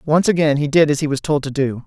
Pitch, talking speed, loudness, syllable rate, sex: 145 Hz, 320 wpm, -17 LUFS, 6.3 syllables/s, male